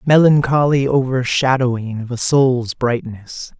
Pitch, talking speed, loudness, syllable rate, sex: 130 Hz, 100 wpm, -16 LUFS, 4.1 syllables/s, male